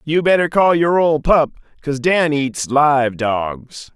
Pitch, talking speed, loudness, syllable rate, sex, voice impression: 145 Hz, 165 wpm, -16 LUFS, 4.0 syllables/s, male, masculine, middle-aged, tensed, powerful, slightly bright, slightly clear, raspy, mature, slightly friendly, wild, lively, intense